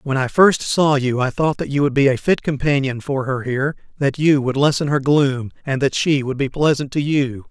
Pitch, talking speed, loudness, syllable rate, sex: 140 Hz, 240 wpm, -18 LUFS, 5.1 syllables/s, male